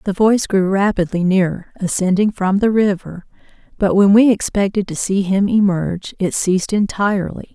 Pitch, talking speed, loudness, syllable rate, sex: 195 Hz, 160 wpm, -16 LUFS, 5.1 syllables/s, female